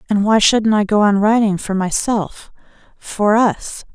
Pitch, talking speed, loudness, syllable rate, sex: 210 Hz, 150 wpm, -15 LUFS, 4.0 syllables/s, female